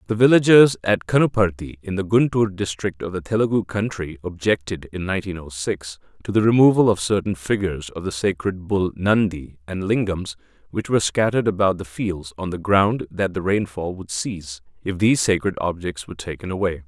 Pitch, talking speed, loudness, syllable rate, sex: 95 Hz, 180 wpm, -21 LUFS, 5.6 syllables/s, male